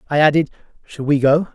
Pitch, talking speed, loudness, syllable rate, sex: 150 Hz, 195 wpm, -17 LUFS, 6.3 syllables/s, male